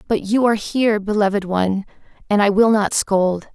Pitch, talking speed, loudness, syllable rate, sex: 205 Hz, 185 wpm, -18 LUFS, 5.6 syllables/s, female